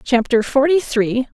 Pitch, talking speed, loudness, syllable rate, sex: 255 Hz, 130 wpm, -17 LUFS, 4.1 syllables/s, female